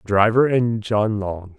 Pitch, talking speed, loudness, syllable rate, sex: 110 Hz, 150 wpm, -19 LUFS, 3.5 syllables/s, male